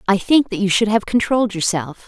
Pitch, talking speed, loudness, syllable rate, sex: 205 Hz, 230 wpm, -17 LUFS, 5.8 syllables/s, female